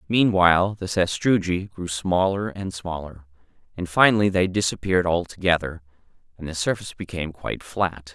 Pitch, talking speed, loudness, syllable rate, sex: 90 Hz, 135 wpm, -22 LUFS, 5.3 syllables/s, male